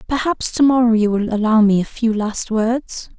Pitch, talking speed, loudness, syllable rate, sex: 225 Hz, 205 wpm, -17 LUFS, 4.8 syllables/s, female